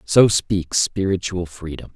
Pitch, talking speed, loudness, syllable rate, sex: 90 Hz, 125 wpm, -20 LUFS, 3.8 syllables/s, male